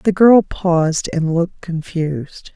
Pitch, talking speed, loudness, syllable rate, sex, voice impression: 170 Hz, 140 wpm, -17 LUFS, 4.1 syllables/s, female, feminine, middle-aged, slightly weak, soft, slightly muffled, intellectual, calm, reassuring, elegant, kind, modest